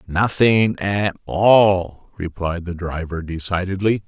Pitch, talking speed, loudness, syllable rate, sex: 95 Hz, 105 wpm, -19 LUFS, 3.5 syllables/s, male